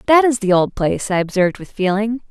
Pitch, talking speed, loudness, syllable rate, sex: 210 Hz, 235 wpm, -17 LUFS, 6.2 syllables/s, female